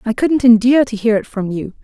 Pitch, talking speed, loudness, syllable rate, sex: 230 Hz, 260 wpm, -14 LUFS, 6.1 syllables/s, female